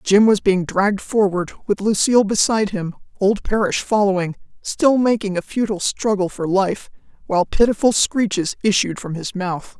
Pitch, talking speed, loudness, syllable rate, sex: 200 Hz, 160 wpm, -19 LUFS, 5.1 syllables/s, female